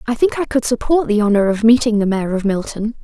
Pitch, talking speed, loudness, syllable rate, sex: 225 Hz, 255 wpm, -16 LUFS, 6.0 syllables/s, female